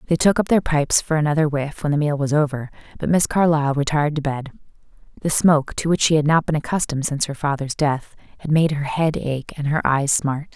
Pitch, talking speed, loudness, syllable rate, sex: 150 Hz, 235 wpm, -20 LUFS, 6.1 syllables/s, female